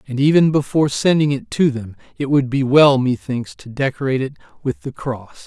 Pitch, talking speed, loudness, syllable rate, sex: 135 Hz, 200 wpm, -18 LUFS, 5.4 syllables/s, male